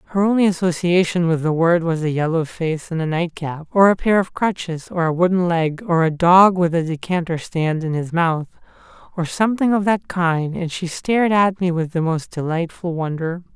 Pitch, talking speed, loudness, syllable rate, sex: 170 Hz, 210 wpm, -19 LUFS, 5.0 syllables/s, male